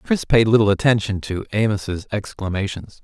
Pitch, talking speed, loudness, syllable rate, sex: 105 Hz, 140 wpm, -20 LUFS, 5.0 syllables/s, male